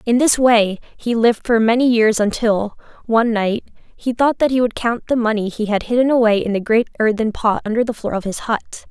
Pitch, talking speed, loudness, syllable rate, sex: 225 Hz, 230 wpm, -17 LUFS, 5.4 syllables/s, female